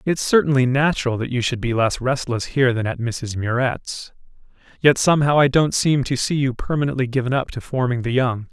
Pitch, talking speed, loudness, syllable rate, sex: 130 Hz, 205 wpm, -20 LUFS, 5.6 syllables/s, male